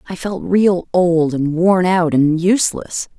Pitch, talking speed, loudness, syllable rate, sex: 175 Hz, 170 wpm, -16 LUFS, 3.8 syllables/s, female